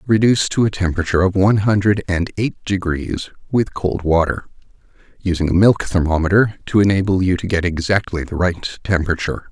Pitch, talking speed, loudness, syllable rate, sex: 95 Hz, 165 wpm, -18 LUFS, 6.0 syllables/s, male